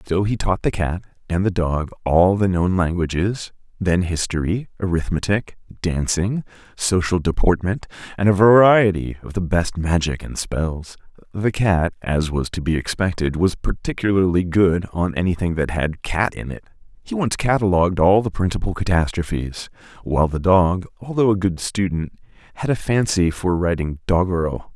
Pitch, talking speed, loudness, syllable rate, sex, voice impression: 90 Hz, 155 wpm, -20 LUFS, 4.8 syllables/s, male, masculine, middle-aged, thick, tensed, powerful, hard, slightly muffled, intellectual, mature, wild, lively, strict, intense